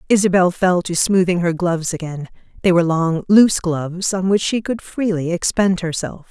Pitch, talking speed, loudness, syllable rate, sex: 180 Hz, 180 wpm, -17 LUFS, 5.3 syllables/s, female